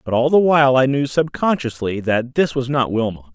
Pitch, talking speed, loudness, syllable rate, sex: 130 Hz, 215 wpm, -18 LUFS, 5.4 syllables/s, male